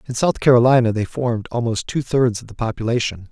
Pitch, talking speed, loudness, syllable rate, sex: 115 Hz, 200 wpm, -19 LUFS, 6.1 syllables/s, male